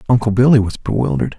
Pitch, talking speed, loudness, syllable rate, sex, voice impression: 110 Hz, 175 wpm, -15 LUFS, 7.4 syllables/s, male, masculine, adult-like, thick, tensed, powerful, slightly dark, slightly muffled, slightly cool, calm, slightly friendly, reassuring, kind, modest